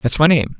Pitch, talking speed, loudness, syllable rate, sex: 145 Hz, 305 wpm, -15 LUFS, 5.5 syllables/s, male